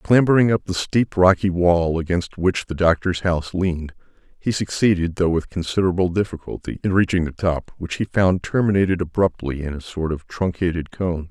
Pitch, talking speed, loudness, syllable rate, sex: 90 Hz, 175 wpm, -21 LUFS, 5.3 syllables/s, male